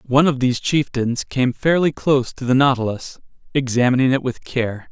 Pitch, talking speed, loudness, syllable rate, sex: 130 Hz, 170 wpm, -19 LUFS, 5.5 syllables/s, male